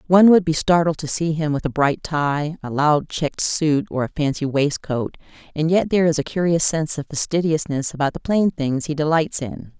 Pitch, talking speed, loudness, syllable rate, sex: 155 Hz, 215 wpm, -20 LUFS, 5.3 syllables/s, female